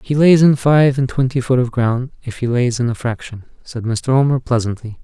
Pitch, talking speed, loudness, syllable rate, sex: 125 Hz, 240 wpm, -16 LUFS, 5.2 syllables/s, male